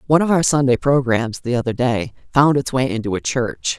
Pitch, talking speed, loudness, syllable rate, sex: 130 Hz, 220 wpm, -18 LUFS, 5.5 syllables/s, female